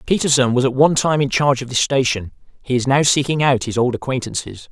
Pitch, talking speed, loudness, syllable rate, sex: 130 Hz, 230 wpm, -17 LUFS, 6.3 syllables/s, male